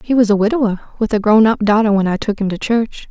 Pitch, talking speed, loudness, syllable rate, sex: 215 Hz, 290 wpm, -15 LUFS, 6.4 syllables/s, female